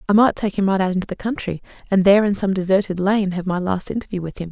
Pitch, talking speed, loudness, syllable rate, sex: 195 Hz, 280 wpm, -20 LUFS, 6.9 syllables/s, female